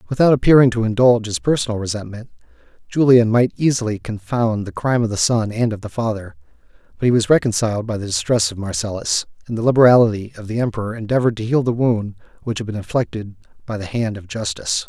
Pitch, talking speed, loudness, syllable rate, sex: 110 Hz, 200 wpm, -18 LUFS, 6.6 syllables/s, male